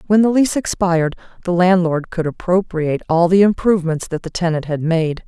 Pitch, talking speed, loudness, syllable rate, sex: 175 Hz, 180 wpm, -17 LUFS, 5.7 syllables/s, female